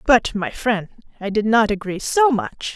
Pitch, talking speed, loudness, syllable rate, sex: 225 Hz, 195 wpm, -19 LUFS, 4.3 syllables/s, female